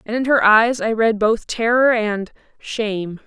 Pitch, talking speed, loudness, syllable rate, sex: 225 Hz, 165 wpm, -17 LUFS, 4.2 syllables/s, female